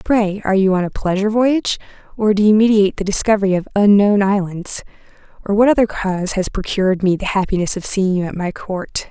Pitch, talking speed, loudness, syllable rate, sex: 200 Hz, 190 wpm, -16 LUFS, 6.2 syllables/s, female